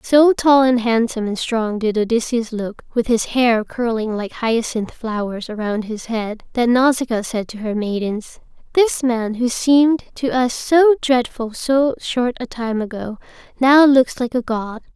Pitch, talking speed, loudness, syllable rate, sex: 240 Hz, 175 wpm, -18 LUFS, 4.2 syllables/s, female